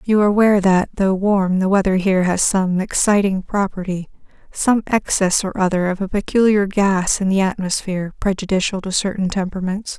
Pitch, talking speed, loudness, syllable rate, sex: 195 Hz, 170 wpm, -18 LUFS, 5.5 syllables/s, female